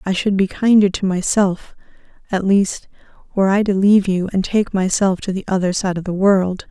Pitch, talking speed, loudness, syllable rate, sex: 195 Hz, 205 wpm, -17 LUFS, 5.2 syllables/s, female